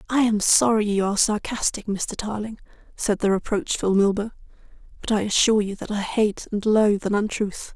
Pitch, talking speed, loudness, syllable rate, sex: 210 Hz, 180 wpm, -22 LUFS, 5.4 syllables/s, female